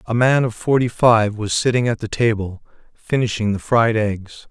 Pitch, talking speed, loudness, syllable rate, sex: 110 Hz, 185 wpm, -18 LUFS, 4.7 syllables/s, male